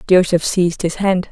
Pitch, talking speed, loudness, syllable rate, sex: 180 Hz, 185 wpm, -16 LUFS, 5.3 syllables/s, female